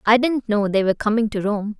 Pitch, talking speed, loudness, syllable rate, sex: 215 Hz, 265 wpm, -20 LUFS, 6.0 syllables/s, female